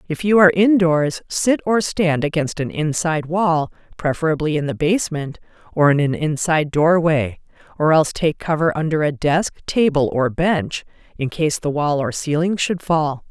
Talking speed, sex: 170 wpm, female